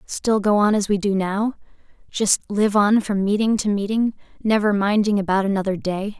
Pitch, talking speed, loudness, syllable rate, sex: 205 Hz, 175 wpm, -20 LUFS, 4.9 syllables/s, female